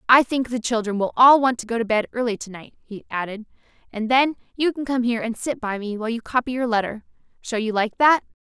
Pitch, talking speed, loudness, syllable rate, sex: 235 Hz, 245 wpm, -21 LUFS, 6.1 syllables/s, female